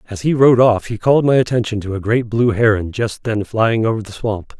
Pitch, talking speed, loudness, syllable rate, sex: 110 Hz, 250 wpm, -16 LUFS, 5.5 syllables/s, male